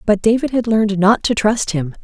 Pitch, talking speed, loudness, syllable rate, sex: 210 Hz, 235 wpm, -16 LUFS, 5.4 syllables/s, female